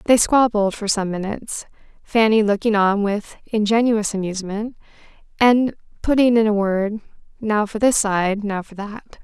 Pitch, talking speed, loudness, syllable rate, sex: 210 Hz, 150 wpm, -19 LUFS, 4.6 syllables/s, female